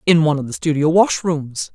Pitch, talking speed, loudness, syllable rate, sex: 155 Hz, 205 wpm, -17 LUFS, 5.6 syllables/s, female